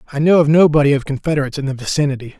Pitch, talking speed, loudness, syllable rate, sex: 145 Hz, 250 wpm, -15 LUFS, 8.5 syllables/s, male